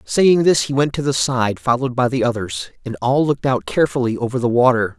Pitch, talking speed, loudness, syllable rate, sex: 125 Hz, 230 wpm, -18 LUFS, 5.9 syllables/s, male